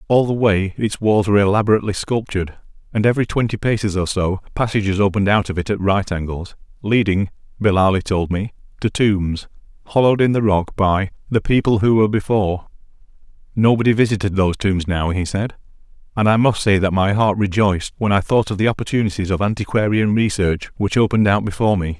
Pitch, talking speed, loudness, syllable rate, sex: 100 Hz, 185 wpm, -18 LUFS, 6.1 syllables/s, male